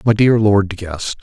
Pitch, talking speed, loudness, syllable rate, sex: 105 Hz, 245 wpm, -15 LUFS, 4.6 syllables/s, male